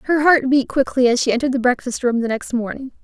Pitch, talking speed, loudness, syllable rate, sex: 255 Hz, 255 wpm, -18 LUFS, 6.2 syllables/s, female